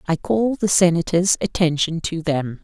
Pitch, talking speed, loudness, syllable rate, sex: 170 Hz, 160 wpm, -19 LUFS, 4.5 syllables/s, female